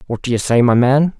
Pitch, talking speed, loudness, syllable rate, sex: 130 Hz, 300 wpm, -14 LUFS, 5.8 syllables/s, male